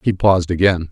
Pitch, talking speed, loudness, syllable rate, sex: 90 Hz, 195 wpm, -16 LUFS, 6.2 syllables/s, male